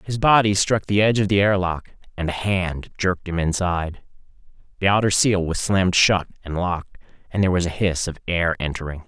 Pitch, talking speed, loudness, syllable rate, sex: 90 Hz, 200 wpm, -21 LUFS, 5.7 syllables/s, male